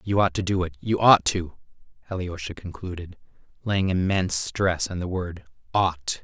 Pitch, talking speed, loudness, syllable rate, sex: 90 Hz, 165 wpm, -24 LUFS, 4.8 syllables/s, male